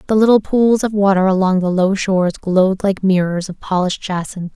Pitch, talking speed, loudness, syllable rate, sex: 190 Hz, 200 wpm, -16 LUFS, 5.6 syllables/s, female